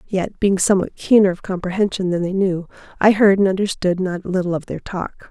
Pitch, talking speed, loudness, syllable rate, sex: 190 Hz, 215 wpm, -18 LUFS, 5.8 syllables/s, female